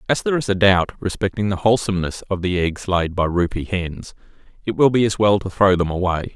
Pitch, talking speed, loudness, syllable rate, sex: 95 Hz, 225 wpm, -19 LUFS, 5.8 syllables/s, male